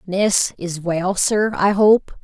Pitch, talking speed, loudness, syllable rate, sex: 195 Hz, 160 wpm, -18 LUFS, 2.9 syllables/s, female